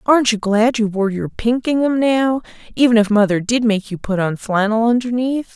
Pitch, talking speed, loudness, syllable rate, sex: 225 Hz, 205 wpm, -17 LUFS, 5.1 syllables/s, female